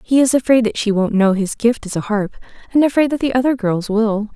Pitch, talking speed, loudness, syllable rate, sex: 225 Hz, 260 wpm, -17 LUFS, 5.8 syllables/s, female